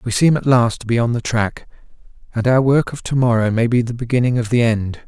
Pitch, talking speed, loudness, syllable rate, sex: 120 Hz, 260 wpm, -17 LUFS, 5.8 syllables/s, male